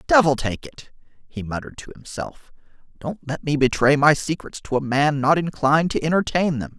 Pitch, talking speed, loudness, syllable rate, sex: 145 Hz, 185 wpm, -21 LUFS, 5.4 syllables/s, male